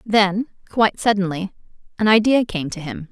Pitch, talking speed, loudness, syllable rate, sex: 200 Hz, 155 wpm, -19 LUFS, 5.2 syllables/s, female